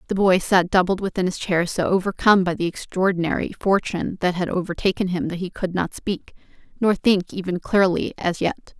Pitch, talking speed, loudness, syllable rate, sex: 185 Hz, 190 wpm, -21 LUFS, 5.5 syllables/s, female